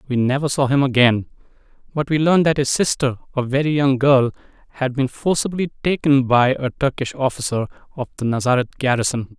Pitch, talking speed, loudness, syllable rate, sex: 135 Hz, 175 wpm, -19 LUFS, 5.8 syllables/s, male